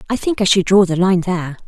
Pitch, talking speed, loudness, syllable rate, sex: 185 Hz, 285 wpm, -15 LUFS, 6.6 syllables/s, female